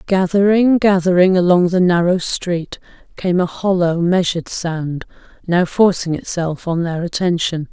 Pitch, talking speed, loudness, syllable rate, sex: 175 Hz, 130 wpm, -16 LUFS, 4.4 syllables/s, female